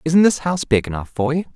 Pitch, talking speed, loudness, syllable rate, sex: 145 Hz, 270 wpm, -19 LUFS, 6.4 syllables/s, male